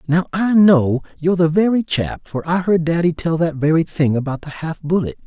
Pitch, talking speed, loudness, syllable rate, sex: 165 Hz, 215 wpm, -17 LUFS, 5.2 syllables/s, male